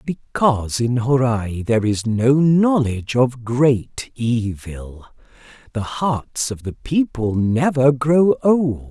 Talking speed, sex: 120 wpm, male